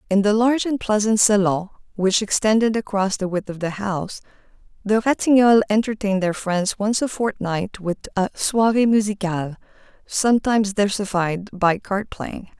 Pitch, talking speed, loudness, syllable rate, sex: 205 Hz, 150 wpm, -20 LUFS, 5.1 syllables/s, female